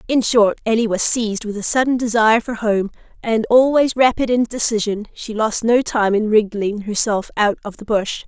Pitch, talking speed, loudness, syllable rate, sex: 220 Hz, 195 wpm, -17 LUFS, 5.1 syllables/s, female